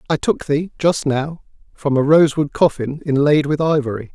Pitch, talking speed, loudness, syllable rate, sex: 145 Hz, 190 wpm, -17 LUFS, 4.8 syllables/s, male